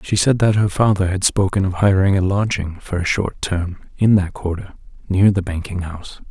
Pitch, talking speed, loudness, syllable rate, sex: 95 Hz, 210 wpm, -18 LUFS, 5.1 syllables/s, male